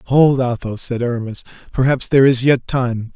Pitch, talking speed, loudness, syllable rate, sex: 125 Hz, 170 wpm, -16 LUFS, 5.1 syllables/s, male